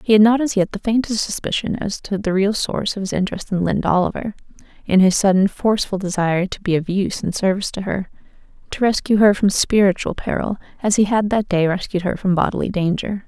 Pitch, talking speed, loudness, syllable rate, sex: 200 Hz, 210 wpm, -19 LUFS, 6.2 syllables/s, female